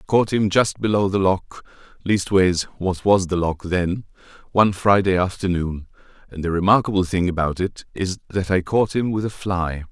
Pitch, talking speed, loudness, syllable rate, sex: 95 Hz, 170 wpm, -20 LUFS, 4.8 syllables/s, male